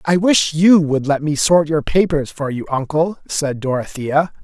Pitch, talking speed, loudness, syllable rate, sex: 155 Hz, 190 wpm, -17 LUFS, 4.4 syllables/s, male